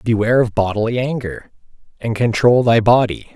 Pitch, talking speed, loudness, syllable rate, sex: 115 Hz, 145 wpm, -16 LUFS, 5.4 syllables/s, male